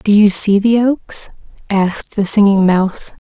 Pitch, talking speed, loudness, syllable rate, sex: 205 Hz, 165 wpm, -13 LUFS, 4.4 syllables/s, female